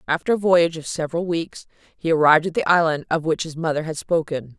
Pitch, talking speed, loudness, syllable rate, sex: 160 Hz, 220 wpm, -21 LUFS, 6.2 syllables/s, female